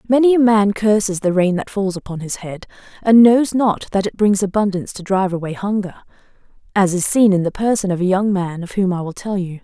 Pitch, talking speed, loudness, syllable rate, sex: 195 Hz, 235 wpm, -17 LUFS, 5.8 syllables/s, female